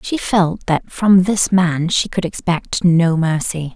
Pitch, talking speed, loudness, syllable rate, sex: 175 Hz, 175 wpm, -16 LUFS, 3.6 syllables/s, female